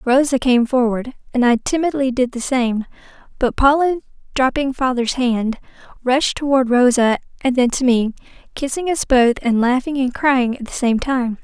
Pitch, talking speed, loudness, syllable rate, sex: 255 Hz, 170 wpm, -18 LUFS, 4.7 syllables/s, female